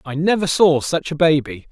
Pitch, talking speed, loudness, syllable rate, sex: 155 Hz, 210 wpm, -17 LUFS, 5.0 syllables/s, male